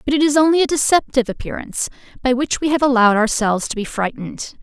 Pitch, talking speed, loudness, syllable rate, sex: 260 Hz, 210 wpm, -18 LUFS, 6.9 syllables/s, female